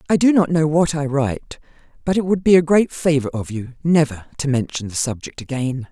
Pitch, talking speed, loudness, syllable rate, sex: 145 Hz, 225 wpm, -19 LUFS, 5.5 syllables/s, female